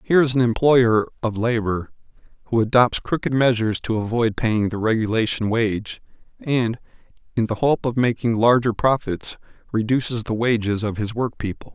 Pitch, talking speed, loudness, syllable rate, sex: 115 Hz, 155 wpm, -21 LUFS, 5.1 syllables/s, male